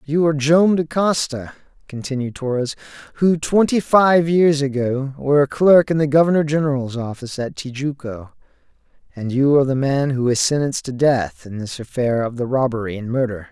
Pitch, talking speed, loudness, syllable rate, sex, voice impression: 135 Hz, 175 wpm, -18 LUFS, 5.3 syllables/s, male, very masculine, very adult-like, slightly old, thick, slightly tensed, slightly weak, slightly bright, soft, clear, slightly fluent, slightly raspy, slightly cool, intellectual, refreshing, sincere, calm, slightly friendly, reassuring, slightly unique, slightly elegant, wild, slightly sweet, lively, kind, intense, slightly light